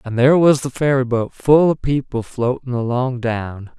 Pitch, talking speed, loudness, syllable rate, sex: 130 Hz, 175 wpm, -17 LUFS, 4.7 syllables/s, male